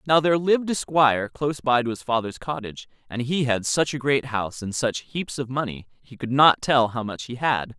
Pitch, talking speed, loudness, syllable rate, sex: 130 Hz, 240 wpm, -23 LUFS, 5.5 syllables/s, male